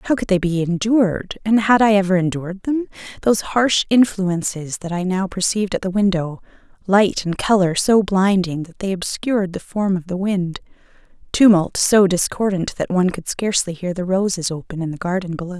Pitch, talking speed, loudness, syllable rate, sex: 190 Hz, 180 wpm, -19 LUFS, 5.3 syllables/s, female